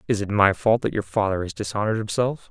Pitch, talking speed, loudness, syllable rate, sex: 105 Hz, 240 wpm, -22 LUFS, 6.4 syllables/s, male